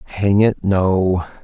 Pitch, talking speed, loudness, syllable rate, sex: 95 Hz, 125 wpm, -17 LUFS, 2.8 syllables/s, male